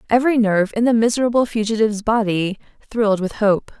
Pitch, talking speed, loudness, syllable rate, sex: 220 Hz, 160 wpm, -18 LUFS, 6.4 syllables/s, female